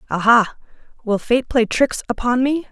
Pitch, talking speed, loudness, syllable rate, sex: 240 Hz, 155 wpm, -18 LUFS, 4.7 syllables/s, female